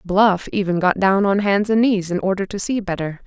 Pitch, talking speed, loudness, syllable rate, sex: 195 Hz, 240 wpm, -19 LUFS, 5.1 syllables/s, female